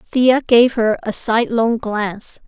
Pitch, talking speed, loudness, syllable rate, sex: 230 Hz, 145 wpm, -16 LUFS, 4.0 syllables/s, female